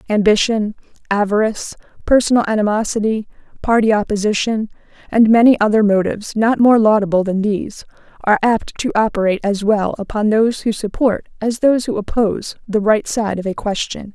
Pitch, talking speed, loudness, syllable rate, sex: 215 Hz, 150 wpm, -16 LUFS, 5.7 syllables/s, female